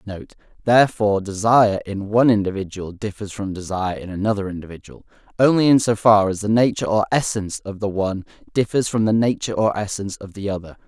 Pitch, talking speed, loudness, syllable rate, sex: 105 Hz, 180 wpm, -20 LUFS, 6.6 syllables/s, male